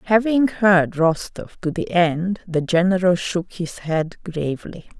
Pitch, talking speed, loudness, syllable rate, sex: 180 Hz, 145 wpm, -20 LUFS, 4.0 syllables/s, female